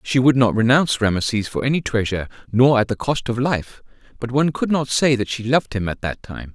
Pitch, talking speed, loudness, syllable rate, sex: 120 Hz, 240 wpm, -19 LUFS, 6.0 syllables/s, male